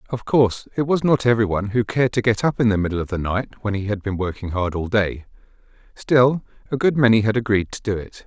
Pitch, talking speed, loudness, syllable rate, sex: 110 Hz, 245 wpm, -20 LUFS, 6.1 syllables/s, male